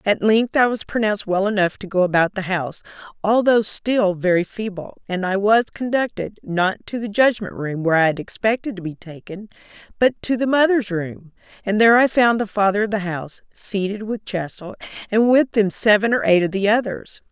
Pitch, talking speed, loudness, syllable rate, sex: 205 Hz, 200 wpm, -19 LUFS, 5.3 syllables/s, female